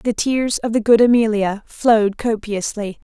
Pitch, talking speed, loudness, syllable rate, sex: 220 Hz, 155 wpm, -17 LUFS, 4.5 syllables/s, female